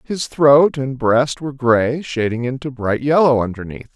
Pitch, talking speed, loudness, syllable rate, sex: 130 Hz, 165 wpm, -17 LUFS, 4.5 syllables/s, male